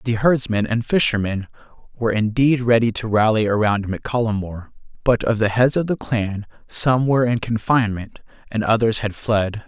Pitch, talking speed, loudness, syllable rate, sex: 110 Hz, 175 wpm, -19 LUFS, 4.9 syllables/s, male